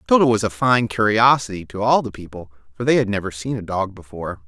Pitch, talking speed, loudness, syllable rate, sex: 110 Hz, 230 wpm, -19 LUFS, 6.2 syllables/s, male